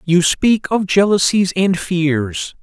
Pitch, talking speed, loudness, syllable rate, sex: 180 Hz, 135 wpm, -15 LUFS, 3.2 syllables/s, male